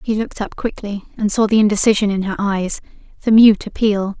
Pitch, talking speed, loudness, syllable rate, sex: 210 Hz, 200 wpm, -16 LUFS, 5.8 syllables/s, female